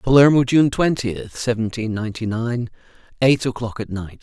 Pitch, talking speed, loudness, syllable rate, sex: 120 Hz, 140 wpm, -20 LUFS, 4.9 syllables/s, male